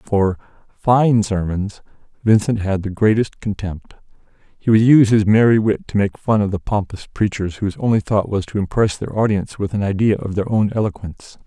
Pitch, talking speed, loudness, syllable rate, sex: 100 Hz, 190 wpm, -18 LUFS, 5.3 syllables/s, male